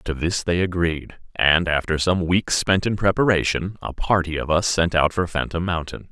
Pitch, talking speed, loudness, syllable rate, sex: 85 Hz, 195 wpm, -21 LUFS, 4.8 syllables/s, male